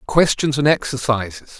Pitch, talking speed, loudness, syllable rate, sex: 130 Hz, 115 wpm, -18 LUFS, 4.8 syllables/s, male